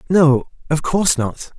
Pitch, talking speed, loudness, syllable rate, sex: 150 Hz, 150 wpm, -17 LUFS, 4.3 syllables/s, male